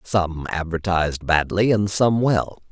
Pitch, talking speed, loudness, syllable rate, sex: 90 Hz, 130 wpm, -21 LUFS, 4.0 syllables/s, male